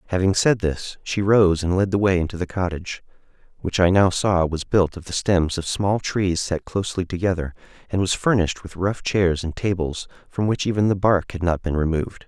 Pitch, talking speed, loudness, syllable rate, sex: 90 Hz, 215 wpm, -21 LUFS, 5.3 syllables/s, male